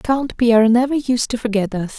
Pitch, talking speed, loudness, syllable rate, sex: 235 Hz, 210 wpm, -17 LUFS, 5.1 syllables/s, female